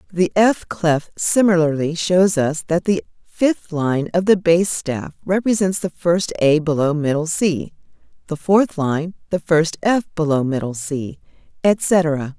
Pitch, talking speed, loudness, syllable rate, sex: 170 Hz, 150 wpm, -18 LUFS, 3.9 syllables/s, female